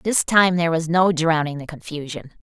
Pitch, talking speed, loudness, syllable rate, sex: 165 Hz, 195 wpm, -19 LUFS, 5.2 syllables/s, female